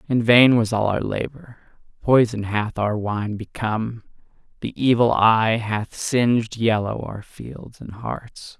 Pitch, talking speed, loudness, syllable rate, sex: 110 Hz, 145 wpm, -20 LUFS, 3.8 syllables/s, male